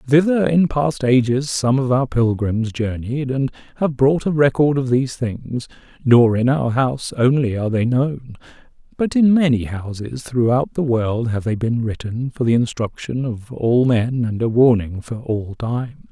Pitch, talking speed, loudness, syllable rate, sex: 125 Hz, 180 wpm, -19 LUFS, 4.4 syllables/s, male